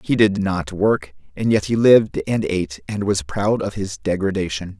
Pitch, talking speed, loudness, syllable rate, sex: 100 Hz, 200 wpm, -20 LUFS, 4.7 syllables/s, male